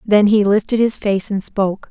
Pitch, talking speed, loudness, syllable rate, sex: 205 Hz, 220 wpm, -16 LUFS, 5.0 syllables/s, female